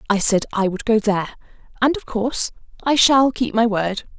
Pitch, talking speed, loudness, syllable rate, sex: 225 Hz, 200 wpm, -19 LUFS, 5.3 syllables/s, female